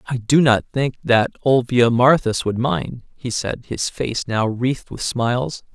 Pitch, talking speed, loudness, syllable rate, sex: 120 Hz, 175 wpm, -19 LUFS, 4.1 syllables/s, male